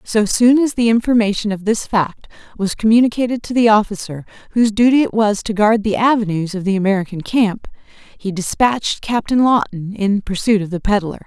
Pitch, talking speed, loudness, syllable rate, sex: 210 Hz, 180 wpm, -16 LUFS, 5.5 syllables/s, female